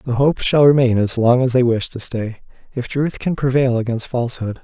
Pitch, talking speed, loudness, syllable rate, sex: 125 Hz, 220 wpm, -17 LUFS, 5.5 syllables/s, male